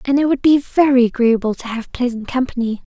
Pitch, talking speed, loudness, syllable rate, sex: 250 Hz, 205 wpm, -17 LUFS, 5.8 syllables/s, female